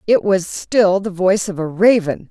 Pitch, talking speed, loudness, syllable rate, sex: 195 Hz, 210 wpm, -16 LUFS, 4.6 syllables/s, female